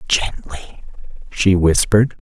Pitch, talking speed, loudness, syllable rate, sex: 95 Hz, 80 wpm, -16 LUFS, 4.5 syllables/s, male